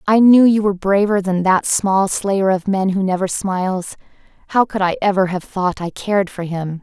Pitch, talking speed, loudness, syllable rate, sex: 190 Hz, 210 wpm, -17 LUFS, 5.0 syllables/s, female